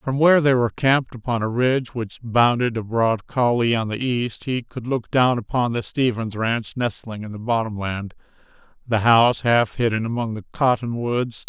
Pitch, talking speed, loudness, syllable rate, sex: 120 Hz, 185 wpm, -21 LUFS, 4.9 syllables/s, male